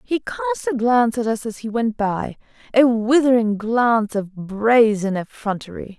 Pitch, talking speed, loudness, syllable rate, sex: 235 Hz, 160 wpm, -19 LUFS, 4.6 syllables/s, female